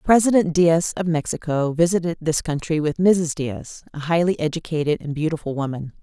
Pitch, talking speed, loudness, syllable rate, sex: 160 Hz, 160 wpm, -21 LUFS, 5.3 syllables/s, female